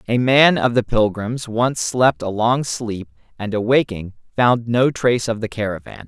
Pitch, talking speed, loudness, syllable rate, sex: 115 Hz, 180 wpm, -18 LUFS, 4.4 syllables/s, male